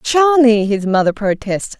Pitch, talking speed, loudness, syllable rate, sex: 230 Hz, 135 wpm, -14 LUFS, 4.4 syllables/s, female